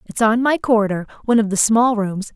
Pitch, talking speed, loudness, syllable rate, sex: 220 Hz, 205 wpm, -17 LUFS, 5.8 syllables/s, female